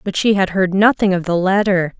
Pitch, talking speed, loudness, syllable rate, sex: 190 Hz, 240 wpm, -15 LUFS, 5.4 syllables/s, female